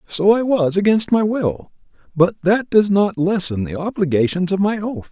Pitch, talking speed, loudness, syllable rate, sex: 190 Hz, 190 wpm, -17 LUFS, 4.7 syllables/s, male